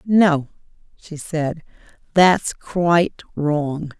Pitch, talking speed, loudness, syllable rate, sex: 160 Hz, 90 wpm, -19 LUFS, 2.6 syllables/s, female